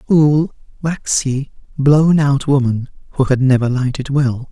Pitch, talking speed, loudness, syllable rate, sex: 140 Hz, 145 wpm, -16 LUFS, 4.1 syllables/s, female